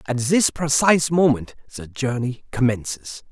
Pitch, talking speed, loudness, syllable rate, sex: 135 Hz, 125 wpm, -20 LUFS, 4.6 syllables/s, male